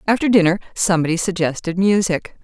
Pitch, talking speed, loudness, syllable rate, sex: 185 Hz, 125 wpm, -18 LUFS, 6.1 syllables/s, female